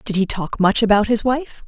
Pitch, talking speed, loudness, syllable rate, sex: 215 Hz, 250 wpm, -18 LUFS, 5.1 syllables/s, female